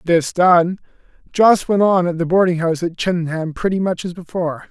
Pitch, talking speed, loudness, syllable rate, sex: 175 Hz, 190 wpm, -17 LUFS, 5.4 syllables/s, male